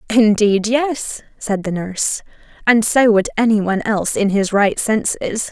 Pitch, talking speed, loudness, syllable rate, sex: 215 Hz, 165 wpm, -17 LUFS, 4.5 syllables/s, female